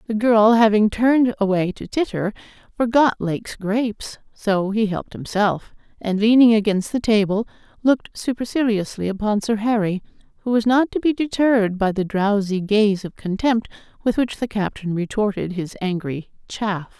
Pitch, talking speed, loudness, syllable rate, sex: 215 Hz, 155 wpm, -20 LUFS, 4.9 syllables/s, female